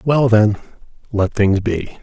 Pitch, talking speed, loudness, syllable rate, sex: 105 Hz, 150 wpm, -16 LUFS, 3.7 syllables/s, male